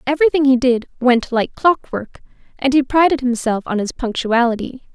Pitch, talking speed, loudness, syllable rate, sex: 255 Hz, 160 wpm, -17 LUFS, 5.1 syllables/s, female